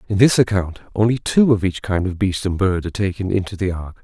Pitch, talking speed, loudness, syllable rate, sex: 100 Hz, 255 wpm, -19 LUFS, 6.0 syllables/s, male